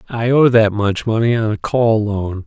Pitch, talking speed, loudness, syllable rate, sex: 110 Hz, 220 wpm, -16 LUFS, 4.4 syllables/s, male